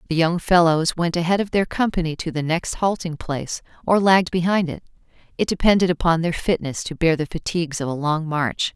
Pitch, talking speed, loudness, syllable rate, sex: 170 Hz, 205 wpm, -21 LUFS, 5.7 syllables/s, female